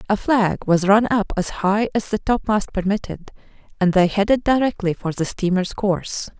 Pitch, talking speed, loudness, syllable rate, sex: 200 Hz, 180 wpm, -20 LUFS, 4.9 syllables/s, female